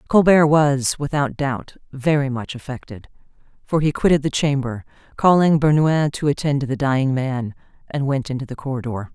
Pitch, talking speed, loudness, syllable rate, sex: 140 Hz, 165 wpm, -19 LUFS, 5.2 syllables/s, female